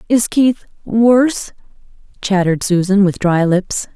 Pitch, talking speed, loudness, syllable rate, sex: 205 Hz, 105 wpm, -14 LUFS, 4.2 syllables/s, female